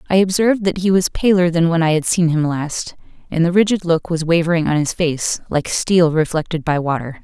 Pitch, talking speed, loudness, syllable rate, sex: 170 Hz, 225 wpm, -17 LUFS, 5.5 syllables/s, female